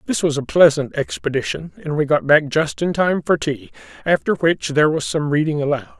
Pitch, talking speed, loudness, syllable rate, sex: 155 Hz, 210 wpm, -18 LUFS, 5.4 syllables/s, male